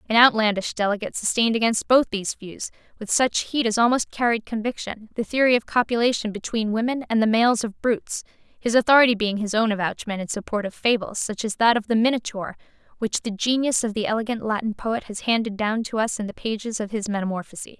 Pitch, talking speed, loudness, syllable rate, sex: 220 Hz, 205 wpm, -22 LUFS, 6.1 syllables/s, female